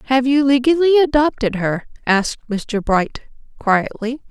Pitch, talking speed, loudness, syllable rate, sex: 250 Hz, 125 wpm, -17 LUFS, 4.4 syllables/s, female